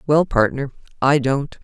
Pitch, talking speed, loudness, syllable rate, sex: 135 Hz, 145 wpm, -19 LUFS, 4.2 syllables/s, female